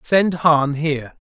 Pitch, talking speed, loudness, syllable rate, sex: 155 Hz, 140 wpm, -18 LUFS, 3.7 syllables/s, male